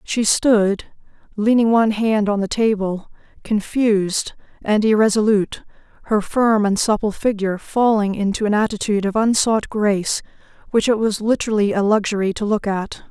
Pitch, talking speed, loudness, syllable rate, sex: 210 Hz, 145 wpm, -18 LUFS, 5.1 syllables/s, female